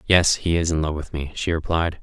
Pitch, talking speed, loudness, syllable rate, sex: 80 Hz, 265 wpm, -22 LUFS, 5.5 syllables/s, male